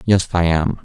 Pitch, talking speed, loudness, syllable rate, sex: 90 Hz, 215 wpm, -17 LUFS, 4.7 syllables/s, male